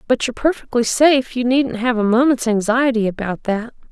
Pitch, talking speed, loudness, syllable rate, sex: 240 Hz, 170 wpm, -17 LUFS, 5.6 syllables/s, female